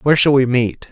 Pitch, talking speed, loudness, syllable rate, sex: 125 Hz, 265 wpm, -14 LUFS, 5.8 syllables/s, male